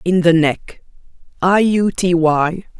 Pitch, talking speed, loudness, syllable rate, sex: 175 Hz, 105 wpm, -15 LUFS, 3.5 syllables/s, female